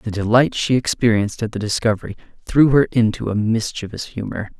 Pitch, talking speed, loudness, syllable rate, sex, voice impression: 110 Hz, 170 wpm, -19 LUFS, 5.8 syllables/s, male, masculine, middle-aged, tensed, bright, soft, fluent, sincere, calm, friendly, reassuring, kind, modest